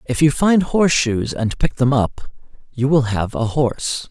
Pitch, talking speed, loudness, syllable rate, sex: 130 Hz, 190 wpm, -18 LUFS, 4.4 syllables/s, male